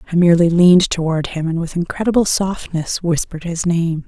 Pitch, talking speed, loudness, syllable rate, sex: 170 Hz, 175 wpm, -16 LUFS, 5.7 syllables/s, female